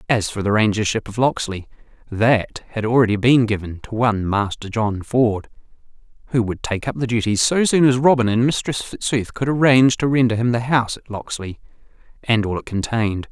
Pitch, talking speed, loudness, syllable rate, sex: 115 Hz, 190 wpm, -19 LUFS, 5.5 syllables/s, male